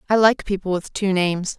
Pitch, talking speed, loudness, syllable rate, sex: 195 Hz, 230 wpm, -20 LUFS, 5.8 syllables/s, female